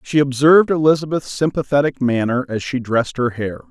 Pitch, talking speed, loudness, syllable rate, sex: 135 Hz, 160 wpm, -17 LUFS, 5.6 syllables/s, male